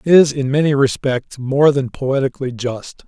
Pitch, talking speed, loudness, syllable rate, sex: 135 Hz, 155 wpm, -17 LUFS, 4.4 syllables/s, male